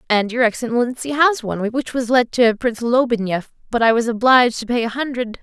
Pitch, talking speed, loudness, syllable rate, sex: 240 Hz, 210 wpm, -18 LUFS, 5.8 syllables/s, female